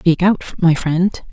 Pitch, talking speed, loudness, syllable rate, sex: 175 Hz, 180 wpm, -16 LUFS, 3.9 syllables/s, female